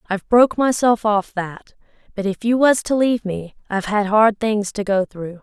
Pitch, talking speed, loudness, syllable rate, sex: 210 Hz, 200 wpm, -18 LUFS, 5.2 syllables/s, female